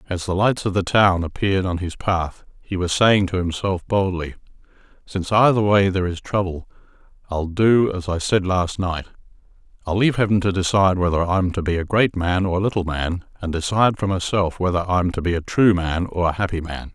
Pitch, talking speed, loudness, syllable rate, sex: 95 Hz, 210 wpm, -20 LUFS, 5.6 syllables/s, male